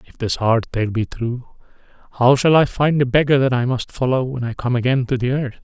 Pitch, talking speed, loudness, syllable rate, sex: 125 Hz, 245 wpm, -18 LUFS, 5.4 syllables/s, male